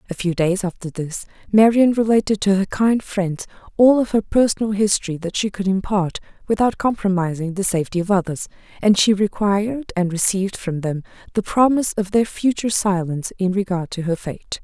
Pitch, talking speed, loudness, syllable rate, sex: 200 Hz, 180 wpm, -19 LUFS, 5.5 syllables/s, female